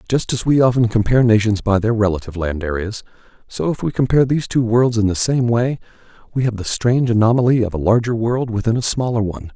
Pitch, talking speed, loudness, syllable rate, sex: 115 Hz, 220 wpm, -17 LUFS, 6.4 syllables/s, male